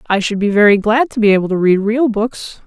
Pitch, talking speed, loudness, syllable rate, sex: 215 Hz, 270 wpm, -14 LUFS, 5.5 syllables/s, female